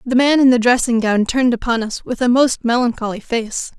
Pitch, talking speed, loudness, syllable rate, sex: 240 Hz, 220 wpm, -16 LUFS, 5.5 syllables/s, female